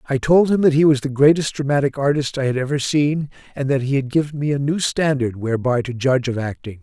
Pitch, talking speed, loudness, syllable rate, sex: 140 Hz, 245 wpm, -19 LUFS, 6.0 syllables/s, male